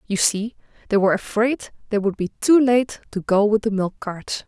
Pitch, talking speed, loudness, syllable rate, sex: 215 Hz, 215 wpm, -21 LUFS, 4.9 syllables/s, female